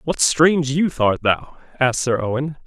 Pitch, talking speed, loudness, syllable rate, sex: 140 Hz, 180 wpm, -19 LUFS, 5.1 syllables/s, male